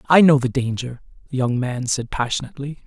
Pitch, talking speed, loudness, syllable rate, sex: 130 Hz, 190 wpm, -20 LUFS, 5.7 syllables/s, male